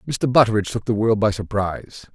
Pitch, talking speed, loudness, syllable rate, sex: 110 Hz, 195 wpm, -20 LUFS, 6.3 syllables/s, male